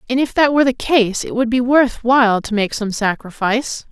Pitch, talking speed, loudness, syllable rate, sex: 235 Hz, 230 wpm, -16 LUFS, 5.4 syllables/s, female